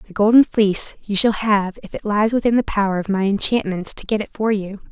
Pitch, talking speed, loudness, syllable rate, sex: 205 Hz, 245 wpm, -18 LUFS, 5.7 syllables/s, female